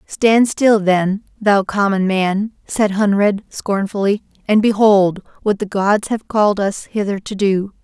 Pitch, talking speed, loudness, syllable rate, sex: 205 Hz, 155 wpm, -16 LUFS, 3.9 syllables/s, female